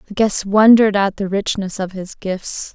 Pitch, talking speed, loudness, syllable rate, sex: 200 Hz, 195 wpm, -17 LUFS, 4.7 syllables/s, female